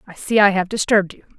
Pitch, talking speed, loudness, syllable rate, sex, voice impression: 195 Hz, 260 wpm, -17 LUFS, 7.1 syllables/s, female, very feminine, young, slightly adult-like, very thin, slightly tensed, slightly weak, bright, soft, clear, fluent, slightly raspy, very cute, intellectual, very refreshing, sincere, very calm, very friendly, very reassuring, very unique, elegant, slightly wild, very sweet, lively, kind, slightly intense, slightly sharp, slightly modest